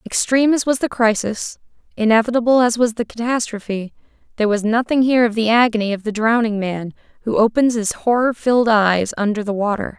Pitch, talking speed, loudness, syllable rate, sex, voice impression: 225 Hz, 180 wpm, -17 LUFS, 5.8 syllables/s, female, very feminine, slightly young, adult-like, very thin, tensed, powerful, bright, hard, very clear, fluent, very cute, intellectual, very refreshing, sincere, slightly calm, friendly, reassuring, unique, elegant, wild, very sweet, lively, kind, slightly intense